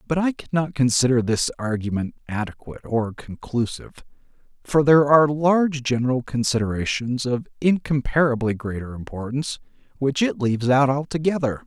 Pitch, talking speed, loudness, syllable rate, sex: 130 Hz, 130 wpm, -22 LUFS, 5.5 syllables/s, male